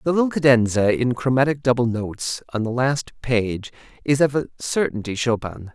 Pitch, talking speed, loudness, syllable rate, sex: 125 Hz, 165 wpm, -21 LUFS, 5.1 syllables/s, male